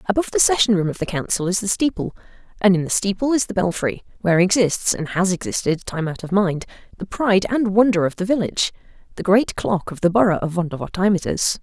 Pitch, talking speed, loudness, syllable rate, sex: 190 Hz, 205 wpm, -20 LUFS, 6.2 syllables/s, female